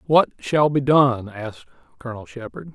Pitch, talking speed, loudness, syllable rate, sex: 130 Hz, 155 wpm, -19 LUFS, 5.1 syllables/s, male